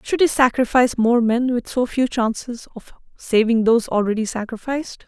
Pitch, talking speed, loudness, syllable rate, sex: 235 Hz, 165 wpm, -19 LUFS, 5.4 syllables/s, female